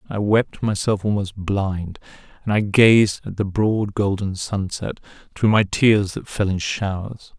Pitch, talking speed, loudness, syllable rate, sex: 100 Hz, 165 wpm, -20 LUFS, 3.9 syllables/s, male